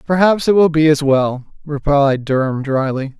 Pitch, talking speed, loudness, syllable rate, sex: 145 Hz, 170 wpm, -15 LUFS, 4.6 syllables/s, male